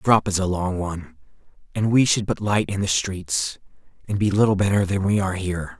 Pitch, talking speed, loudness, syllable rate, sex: 95 Hz, 230 wpm, -22 LUFS, 5.8 syllables/s, male